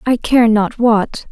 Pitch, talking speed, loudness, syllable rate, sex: 225 Hz, 185 wpm, -13 LUFS, 3.4 syllables/s, female